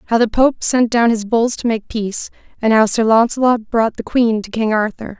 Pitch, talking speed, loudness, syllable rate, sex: 225 Hz, 230 wpm, -16 LUFS, 5.1 syllables/s, female